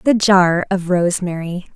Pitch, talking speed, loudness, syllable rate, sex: 180 Hz, 135 wpm, -16 LUFS, 4.6 syllables/s, female